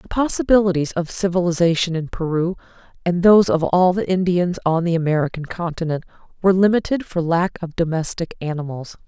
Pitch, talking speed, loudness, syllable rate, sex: 175 Hz, 150 wpm, -19 LUFS, 5.8 syllables/s, female